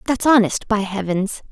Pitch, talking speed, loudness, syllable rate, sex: 210 Hz, 160 wpm, -18 LUFS, 4.6 syllables/s, female